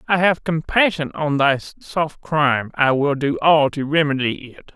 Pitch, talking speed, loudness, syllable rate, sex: 150 Hz, 165 wpm, -19 LUFS, 4.3 syllables/s, male